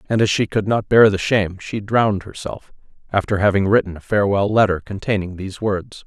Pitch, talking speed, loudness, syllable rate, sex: 100 Hz, 200 wpm, -19 LUFS, 5.8 syllables/s, male